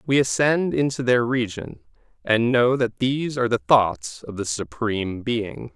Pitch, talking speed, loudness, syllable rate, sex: 120 Hz, 165 wpm, -22 LUFS, 4.4 syllables/s, male